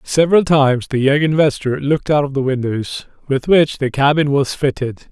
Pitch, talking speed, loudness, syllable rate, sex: 140 Hz, 190 wpm, -16 LUFS, 5.2 syllables/s, male